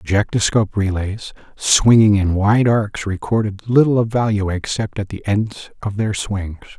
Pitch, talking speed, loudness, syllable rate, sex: 105 Hz, 160 wpm, -18 LUFS, 4.7 syllables/s, male